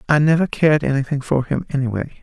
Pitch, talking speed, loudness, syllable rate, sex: 140 Hz, 190 wpm, -18 LUFS, 6.6 syllables/s, male